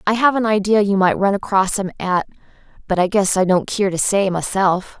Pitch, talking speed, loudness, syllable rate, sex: 195 Hz, 215 wpm, -17 LUFS, 5.3 syllables/s, female